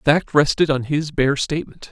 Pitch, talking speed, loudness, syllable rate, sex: 145 Hz, 220 wpm, -19 LUFS, 5.6 syllables/s, male